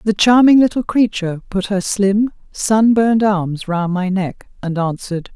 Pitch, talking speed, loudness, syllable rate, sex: 200 Hz, 170 wpm, -16 LUFS, 4.5 syllables/s, female